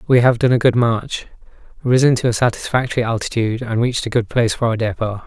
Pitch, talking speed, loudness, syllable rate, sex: 120 Hz, 215 wpm, -18 LUFS, 6.6 syllables/s, male